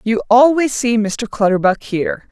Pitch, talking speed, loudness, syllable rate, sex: 230 Hz, 155 wpm, -15 LUFS, 4.9 syllables/s, female